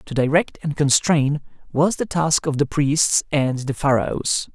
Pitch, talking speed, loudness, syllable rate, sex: 145 Hz, 170 wpm, -20 LUFS, 4.0 syllables/s, male